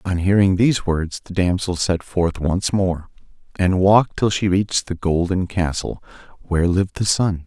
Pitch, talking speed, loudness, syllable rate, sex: 90 Hz, 175 wpm, -19 LUFS, 4.8 syllables/s, male